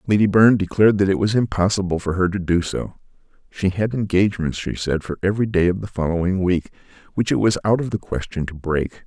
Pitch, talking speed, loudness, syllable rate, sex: 95 Hz, 220 wpm, -20 LUFS, 6.1 syllables/s, male